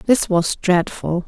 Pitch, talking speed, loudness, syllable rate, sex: 185 Hz, 140 wpm, -18 LUFS, 3.3 syllables/s, female